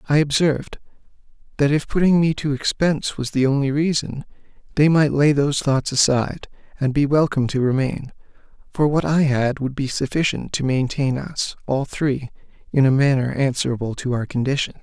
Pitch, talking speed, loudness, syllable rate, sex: 140 Hz, 170 wpm, -20 LUFS, 5.4 syllables/s, male